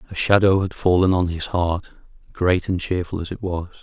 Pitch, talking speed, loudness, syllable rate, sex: 90 Hz, 205 wpm, -21 LUFS, 5.2 syllables/s, male